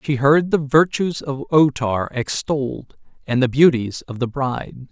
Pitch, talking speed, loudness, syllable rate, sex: 135 Hz, 170 wpm, -19 LUFS, 4.3 syllables/s, male